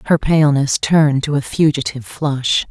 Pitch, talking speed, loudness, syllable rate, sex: 140 Hz, 155 wpm, -16 LUFS, 5.2 syllables/s, female